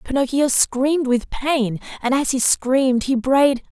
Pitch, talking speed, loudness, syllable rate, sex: 265 Hz, 160 wpm, -19 LUFS, 4.2 syllables/s, female